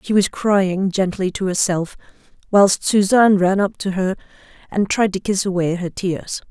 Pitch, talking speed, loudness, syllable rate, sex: 190 Hz, 175 wpm, -18 LUFS, 4.6 syllables/s, female